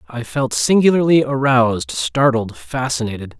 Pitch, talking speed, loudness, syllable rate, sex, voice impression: 130 Hz, 105 wpm, -17 LUFS, 4.7 syllables/s, male, masculine, adult-like, tensed, powerful, slightly muffled, raspy, cool, intellectual, slightly mature, friendly, wild, lively, slightly strict, slightly intense